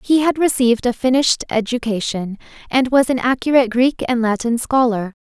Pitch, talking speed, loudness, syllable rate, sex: 245 Hz, 160 wpm, -17 LUFS, 5.5 syllables/s, female